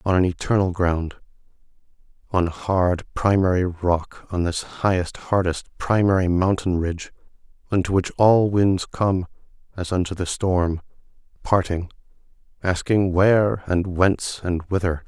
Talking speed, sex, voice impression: 125 wpm, male, masculine, adult-like, relaxed, slightly weak, slightly dark, muffled, raspy, sincere, calm, kind, modest